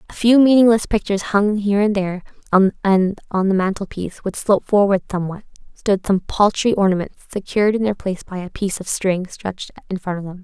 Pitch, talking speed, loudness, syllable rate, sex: 200 Hz, 200 wpm, -18 LUFS, 6.2 syllables/s, female